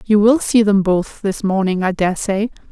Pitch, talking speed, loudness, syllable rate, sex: 200 Hz, 220 wpm, -16 LUFS, 4.5 syllables/s, female